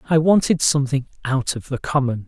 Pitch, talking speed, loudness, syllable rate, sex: 140 Hz, 185 wpm, -20 LUFS, 5.8 syllables/s, male